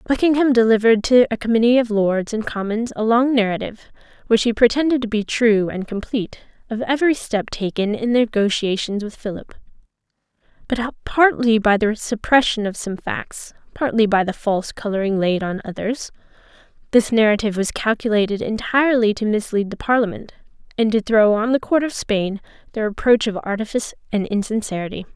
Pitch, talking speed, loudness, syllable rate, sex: 220 Hz, 160 wpm, -19 LUFS, 5.6 syllables/s, female